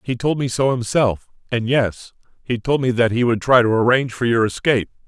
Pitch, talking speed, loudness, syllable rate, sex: 120 Hz, 215 wpm, -18 LUFS, 5.6 syllables/s, male